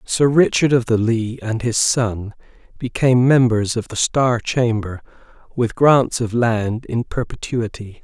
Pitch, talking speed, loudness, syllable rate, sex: 120 Hz, 150 wpm, -18 LUFS, 4.0 syllables/s, male